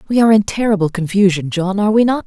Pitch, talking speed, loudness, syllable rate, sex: 200 Hz, 240 wpm, -15 LUFS, 7.2 syllables/s, female